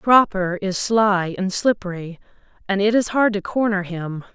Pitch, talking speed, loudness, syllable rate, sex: 200 Hz, 165 wpm, -20 LUFS, 4.3 syllables/s, female